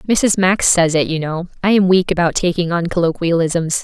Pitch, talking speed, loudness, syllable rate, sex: 175 Hz, 205 wpm, -16 LUFS, 5.1 syllables/s, female